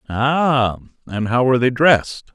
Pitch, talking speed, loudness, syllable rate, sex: 125 Hz, 155 wpm, -17 LUFS, 4.4 syllables/s, male